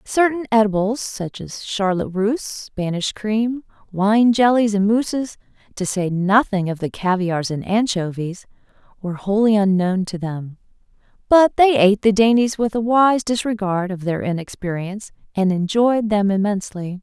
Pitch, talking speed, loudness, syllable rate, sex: 205 Hz, 145 wpm, -19 LUFS, 4.7 syllables/s, female